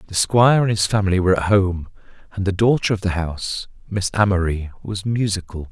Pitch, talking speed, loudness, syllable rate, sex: 100 Hz, 190 wpm, -19 LUFS, 5.9 syllables/s, male